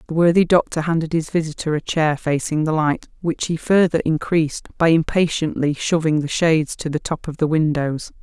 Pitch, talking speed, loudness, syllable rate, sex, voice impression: 160 Hz, 190 wpm, -19 LUFS, 5.4 syllables/s, female, feminine, very adult-like, slightly intellectual, calm, elegant